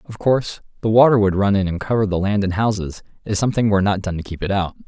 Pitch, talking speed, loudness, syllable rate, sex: 100 Hz, 270 wpm, -19 LUFS, 7.0 syllables/s, male